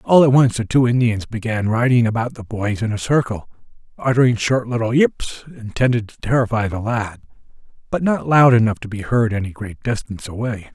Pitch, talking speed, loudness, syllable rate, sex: 115 Hz, 190 wpm, -18 LUFS, 5.5 syllables/s, male